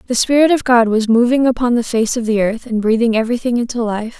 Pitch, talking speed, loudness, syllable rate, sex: 235 Hz, 245 wpm, -15 LUFS, 6.2 syllables/s, female